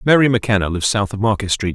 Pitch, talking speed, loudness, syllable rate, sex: 105 Hz, 240 wpm, -17 LUFS, 7.7 syllables/s, male